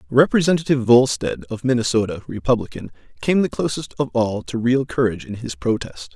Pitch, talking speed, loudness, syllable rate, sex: 125 Hz, 155 wpm, -20 LUFS, 5.8 syllables/s, male